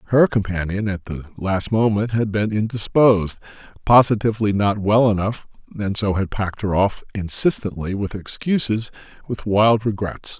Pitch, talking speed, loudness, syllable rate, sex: 105 Hz, 140 wpm, -20 LUFS, 4.9 syllables/s, male